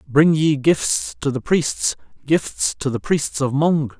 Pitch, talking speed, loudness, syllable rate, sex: 145 Hz, 180 wpm, -19 LUFS, 3.5 syllables/s, male